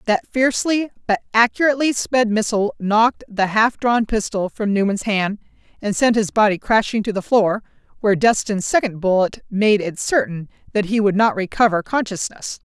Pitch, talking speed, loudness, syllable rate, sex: 215 Hz, 165 wpm, -19 LUFS, 5.2 syllables/s, female